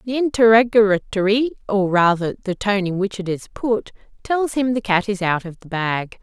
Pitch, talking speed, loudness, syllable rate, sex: 205 Hz, 195 wpm, -19 LUFS, 4.9 syllables/s, female